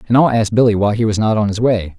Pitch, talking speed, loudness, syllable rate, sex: 110 Hz, 335 wpm, -15 LUFS, 7.2 syllables/s, male